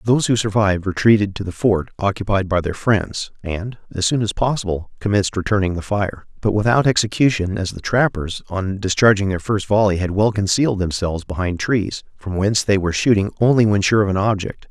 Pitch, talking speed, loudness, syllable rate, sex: 100 Hz, 195 wpm, -19 LUFS, 5.7 syllables/s, male